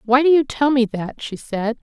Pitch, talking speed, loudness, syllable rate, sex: 250 Hz, 250 wpm, -19 LUFS, 4.7 syllables/s, female